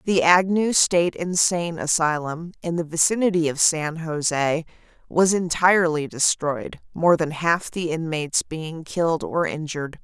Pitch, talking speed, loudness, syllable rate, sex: 165 Hz, 140 wpm, -21 LUFS, 4.4 syllables/s, female